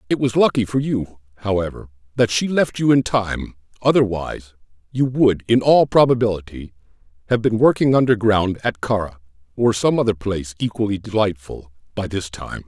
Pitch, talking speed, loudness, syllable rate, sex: 105 Hz, 155 wpm, -19 LUFS, 5.3 syllables/s, male